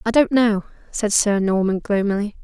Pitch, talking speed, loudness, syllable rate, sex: 215 Hz, 170 wpm, -19 LUFS, 5.0 syllables/s, female